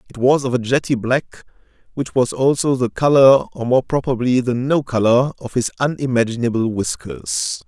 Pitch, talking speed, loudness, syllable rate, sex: 125 Hz, 155 wpm, -18 LUFS, 4.9 syllables/s, male